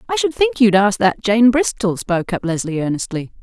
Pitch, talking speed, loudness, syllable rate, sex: 210 Hz, 210 wpm, -17 LUFS, 5.4 syllables/s, female